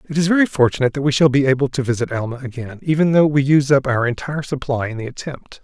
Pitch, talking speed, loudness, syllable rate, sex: 135 Hz, 255 wpm, -18 LUFS, 7.0 syllables/s, male